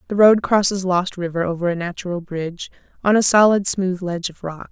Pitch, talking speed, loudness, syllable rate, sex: 185 Hz, 205 wpm, -19 LUFS, 5.7 syllables/s, female